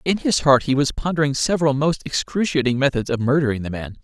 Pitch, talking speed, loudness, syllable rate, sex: 140 Hz, 210 wpm, -20 LUFS, 6.2 syllables/s, male